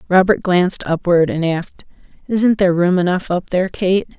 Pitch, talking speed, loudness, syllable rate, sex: 180 Hz, 170 wpm, -16 LUFS, 5.4 syllables/s, female